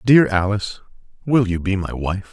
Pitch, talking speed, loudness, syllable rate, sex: 100 Hz, 180 wpm, -19 LUFS, 5.1 syllables/s, male